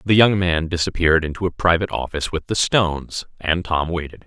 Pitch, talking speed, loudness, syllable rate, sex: 85 Hz, 195 wpm, -20 LUFS, 5.9 syllables/s, male